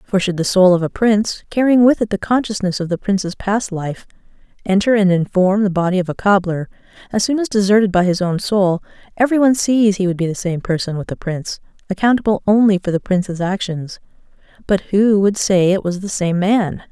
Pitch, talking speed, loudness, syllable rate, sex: 195 Hz, 215 wpm, -16 LUFS, 5.7 syllables/s, female